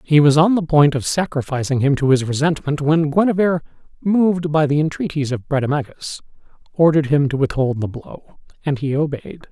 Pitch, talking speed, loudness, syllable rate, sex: 150 Hz, 175 wpm, -18 LUFS, 5.6 syllables/s, male